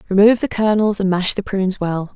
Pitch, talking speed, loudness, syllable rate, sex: 200 Hz, 225 wpm, -17 LUFS, 6.2 syllables/s, female